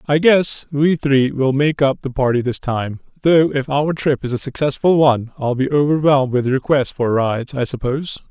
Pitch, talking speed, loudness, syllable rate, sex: 140 Hz, 200 wpm, -17 LUFS, 5.1 syllables/s, male